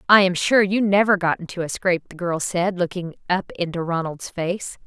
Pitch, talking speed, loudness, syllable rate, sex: 180 Hz, 210 wpm, -21 LUFS, 5.2 syllables/s, female